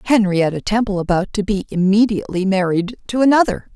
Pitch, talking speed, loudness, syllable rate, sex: 200 Hz, 145 wpm, -17 LUFS, 5.7 syllables/s, female